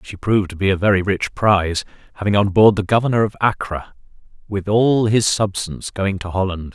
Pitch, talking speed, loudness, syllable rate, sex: 100 Hz, 195 wpm, -18 LUFS, 5.6 syllables/s, male